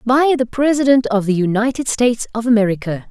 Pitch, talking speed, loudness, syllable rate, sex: 235 Hz, 175 wpm, -16 LUFS, 5.8 syllables/s, female